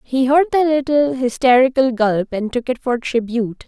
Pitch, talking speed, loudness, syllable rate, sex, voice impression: 255 Hz, 180 wpm, -17 LUFS, 4.9 syllables/s, female, feminine, slightly young, cute, friendly, slightly kind